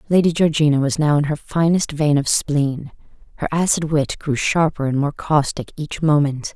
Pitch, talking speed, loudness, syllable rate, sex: 150 Hz, 185 wpm, -19 LUFS, 4.8 syllables/s, female